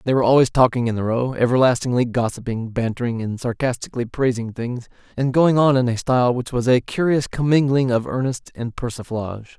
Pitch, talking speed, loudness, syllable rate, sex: 125 Hz, 180 wpm, -20 LUFS, 5.8 syllables/s, male